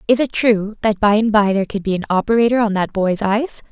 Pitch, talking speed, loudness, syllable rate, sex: 210 Hz, 260 wpm, -17 LUFS, 5.9 syllables/s, female